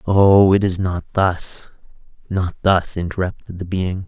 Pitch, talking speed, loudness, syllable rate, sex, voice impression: 95 Hz, 135 wpm, -18 LUFS, 3.9 syllables/s, male, very masculine, middle-aged, very thick, relaxed, weak, dark, soft, slightly clear, fluent, slightly raspy, cool, intellectual, slightly sincere, very calm, mature, friendly, slightly reassuring, slightly unique, slightly elegant, slightly wild, sweet, lively, very kind, very modest